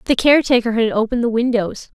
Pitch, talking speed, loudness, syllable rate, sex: 235 Hz, 180 wpm, -16 LUFS, 6.8 syllables/s, female